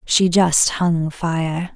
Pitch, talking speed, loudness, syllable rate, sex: 170 Hz, 135 wpm, -18 LUFS, 2.5 syllables/s, female